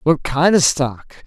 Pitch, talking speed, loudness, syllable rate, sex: 145 Hz, 190 wpm, -16 LUFS, 3.4 syllables/s, male